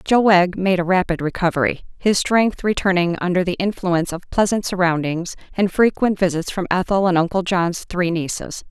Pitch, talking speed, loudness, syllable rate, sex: 185 Hz, 170 wpm, -19 LUFS, 5.2 syllables/s, female